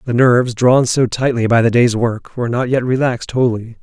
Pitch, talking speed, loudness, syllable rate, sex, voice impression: 120 Hz, 220 wpm, -15 LUFS, 5.5 syllables/s, male, very masculine, adult-like, slightly middle-aged, thick, tensed, powerful, slightly bright, slightly hard, very clear, very fluent, very cool, very intellectual, refreshing, very sincere, very calm, mature, very friendly, very reassuring, unique, slightly elegant, very wild, sweet, slightly lively, kind, slightly modest